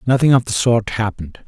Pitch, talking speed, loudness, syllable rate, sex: 115 Hz, 205 wpm, -16 LUFS, 6.0 syllables/s, male